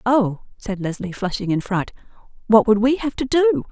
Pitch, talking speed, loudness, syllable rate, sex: 225 Hz, 195 wpm, -20 LUFS, 5.0 syllables/s, female